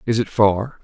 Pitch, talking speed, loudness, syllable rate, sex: 110 Hz, 215 wpm, -18 LUFS, 4.2 syllables/s, male